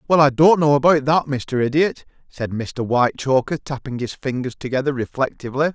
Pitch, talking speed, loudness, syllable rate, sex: 135 Hz, 165 wpm, -19 LUFS, 5.5 syllables/s, male